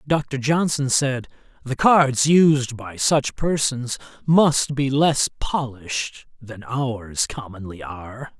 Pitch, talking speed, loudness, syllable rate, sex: 130 Hz, 120 wpm, -20 LUFS, 3.3 syllables/s, male